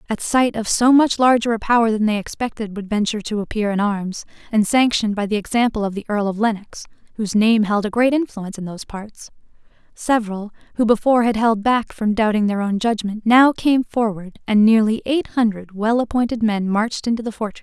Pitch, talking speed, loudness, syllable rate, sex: 220 Hz, 210 wpm, -19 LUFS, 5.1 syllables/s, female